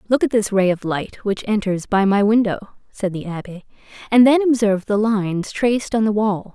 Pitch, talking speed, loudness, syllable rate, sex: 210 Hz, 210 wpm, -18 LUFS, 5.3 syllables/s, female